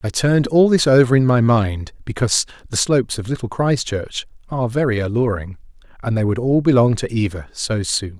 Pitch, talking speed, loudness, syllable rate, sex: 120 Hz, 190 wpm, -18 LUFS, 5.6 syllables/s, male